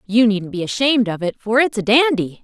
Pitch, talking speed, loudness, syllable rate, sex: 220 Hz, 245 wpm, -17 LUFS, 5.7 syllables/s, female